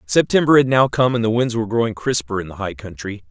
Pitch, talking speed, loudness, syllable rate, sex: 115 Hz, 255 wpm, -18 LUFS, 6.4 syllables/s, male